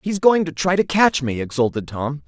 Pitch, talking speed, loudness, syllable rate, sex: 155 Hz, 240 wpm, -19 LUFS, 5.1 syllables/s, male